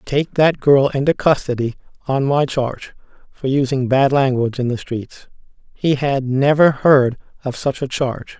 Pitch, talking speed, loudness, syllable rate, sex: 135 Hz, 165 wpm, -17 LUFS, 4.6 syllables/s, male